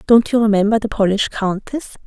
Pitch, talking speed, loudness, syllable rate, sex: 215 Hz, 175 wpm, -17 LUFS, 5.7 syllables/s, female